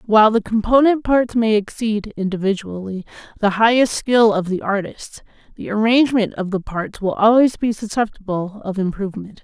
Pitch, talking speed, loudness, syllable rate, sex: 210 Hz, 155 wpm, -18 LUFS, 5.2 syllables/s, female